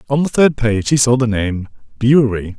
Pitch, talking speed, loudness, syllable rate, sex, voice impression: 120 Hz, 210 wpm, -15 LUFS, 5.2 syllables/s, male, very masculine, very middle-aged, very thick, tensed, very powerful, bright, slightly soft, slightly muffled, fluent, very cool, intellectual, refreshing, slightly sincere, slightly calm, friendly, reassuring, unique, very elegant, wild, sweet, very lively, kind, intense